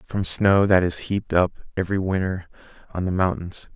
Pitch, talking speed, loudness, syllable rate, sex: 95 Hz, 175 wpm, -22 LUFS, 5.2 syllables/s, male